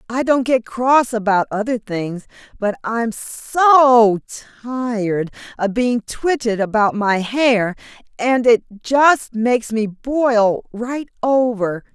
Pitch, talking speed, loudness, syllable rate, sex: 235 Hz, 125 wpm, -17 LUFS, 3.3 syllables/s, female